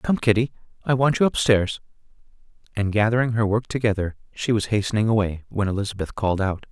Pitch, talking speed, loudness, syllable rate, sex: 110 Hz, 180 wpm, -22 LUFS, 6.1 syllables/s, male